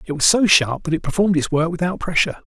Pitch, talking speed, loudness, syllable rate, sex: 165 Hz, 265 wpm, -18 LUFS, 6.9 syllables/s, male